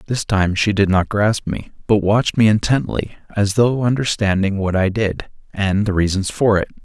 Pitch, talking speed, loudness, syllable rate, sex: 105 Hz, 195 wpm, -18 LUFS, 4.8 syllables/s, male